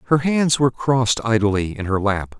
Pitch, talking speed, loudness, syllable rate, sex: 120 Hz, 200 wpm, -19 LUFS, 5.2 syllables/s, male